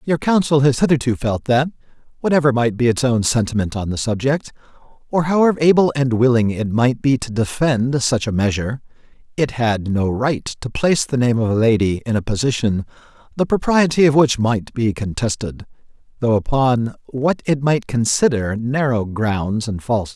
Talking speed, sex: 180 wpm, male